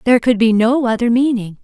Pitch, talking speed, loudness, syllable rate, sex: 235 Hz, 220 wpm, -14 LUFS, 6.1 syllables/s, female